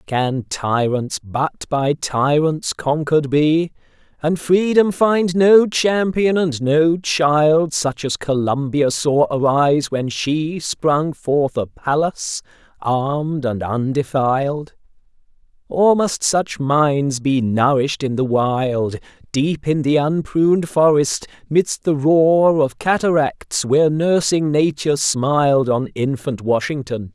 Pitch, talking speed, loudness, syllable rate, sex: 145 Hz, 120 wpm, -18 LUFS, 3.5 syllables/s, male